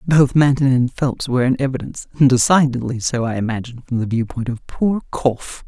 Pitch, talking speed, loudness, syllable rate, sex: 130 Hz, 180 wpm, -18 LUFS, 5.5 syllables/s, female